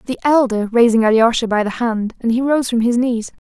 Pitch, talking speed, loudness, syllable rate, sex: 235 Hz, 225 wpm, -16 LUFS, 5.5 syllables/s, female